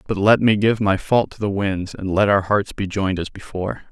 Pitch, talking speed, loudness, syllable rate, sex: 100 Hz, 260 wpm, -20 LUFS, 5.4 syllables/s, male